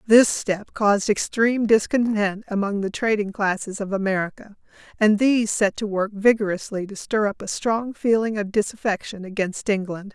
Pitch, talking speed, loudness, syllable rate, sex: 210 Hz, 160 wpm, -22 LUFS, 5.0 syllables/s, female